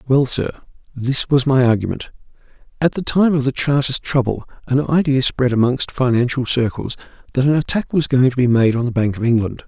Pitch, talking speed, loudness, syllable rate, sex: 130 Hz, 200 wpm, -17 LUFS, 5.4 syllables/s, male